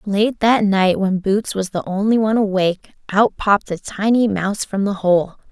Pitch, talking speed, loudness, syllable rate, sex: 200 Hz, 195 wpm, -18 LUFS, 4.9 syllables/s, female